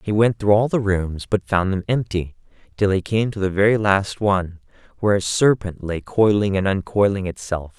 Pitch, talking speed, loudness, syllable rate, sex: 100 Hz, 200 wpm, -20 LUFS, 5.1 syllables/s, male